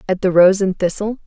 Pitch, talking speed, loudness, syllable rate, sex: 190 Hz, 240 wpm, -15 LUFS, 5.7 syllables/s, female